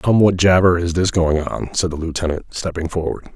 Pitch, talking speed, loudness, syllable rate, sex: 85 Hz, 215 wpm, -18 LUFS, 5.3 syllables/s, male